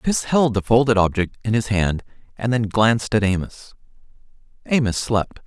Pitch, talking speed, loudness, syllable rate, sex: 110 Hz, 165 wpm, -20 LUFS, 5.0 syllables/s, male